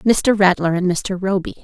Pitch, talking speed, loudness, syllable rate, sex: 190 Hz, 185 wpm, -17 LUFS, 4.6 syllables/s, female